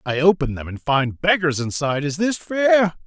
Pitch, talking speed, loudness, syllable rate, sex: 160 Hz, 195 wpm, -20 LUFS, 4.9 syllables/s, male